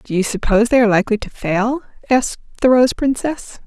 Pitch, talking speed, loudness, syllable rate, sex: 230 Hz, 195 wpm, -17 LUFS, 5.8 syllables/s, female